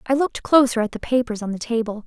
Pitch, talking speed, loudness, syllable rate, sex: 235 Hz, 260 wpm, -21 LUFS, 6.7 syllables/s, female